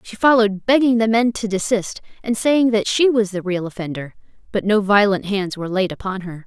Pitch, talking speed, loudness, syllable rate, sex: 205 Hz, 215 wpm, -18 LUFS, 5.5 syllables/s, female